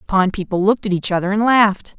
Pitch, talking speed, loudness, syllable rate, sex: 200 Hz, 270 wpm, -17 LUFS, 7.3 syllables/s, female